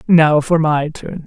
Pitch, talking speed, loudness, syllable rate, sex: 155 Hz, 190 wpm, -15 LUFS, 3.6 syllables/s, female